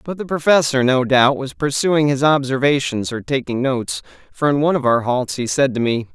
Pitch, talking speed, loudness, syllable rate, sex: 135 Hz, 215 wpm, -17 LUFS, 5.4 syllables/s, male